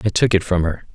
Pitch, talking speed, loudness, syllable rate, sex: 95 Hz, 315 wpm, -19 LUFS, 6.3 syllables/s, male